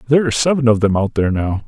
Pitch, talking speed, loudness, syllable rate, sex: 115 Hz, 285 wpm, -16 LUFS, 8.3 syllables/s, male